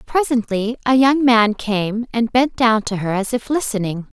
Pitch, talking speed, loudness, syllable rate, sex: 230 Hz, 185 wpm, -18 LUFS, 4.4 syllables/s, female